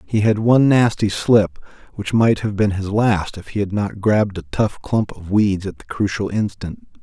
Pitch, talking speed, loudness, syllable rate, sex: 105 Hz, 215 wpm, -19 LUFS, 4.7 syllables/s, male